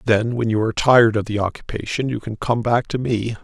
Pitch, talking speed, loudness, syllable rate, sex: 115 Hz, 245 wpm, -19 LUFS, 5.9 syllables/s, male